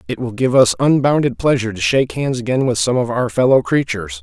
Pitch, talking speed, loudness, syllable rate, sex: 125 Hz, 225 wpm, -16 LUFS, 6.2 syllables/s, male